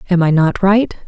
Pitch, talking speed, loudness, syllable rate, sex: 185 Hz, 225 wpm, -14 LUFS, 4.9 syllables/s, female